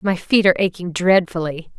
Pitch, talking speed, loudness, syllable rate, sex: 180 Hz, 170 wpm, -18 LUFS, 5.6 syllables/s, female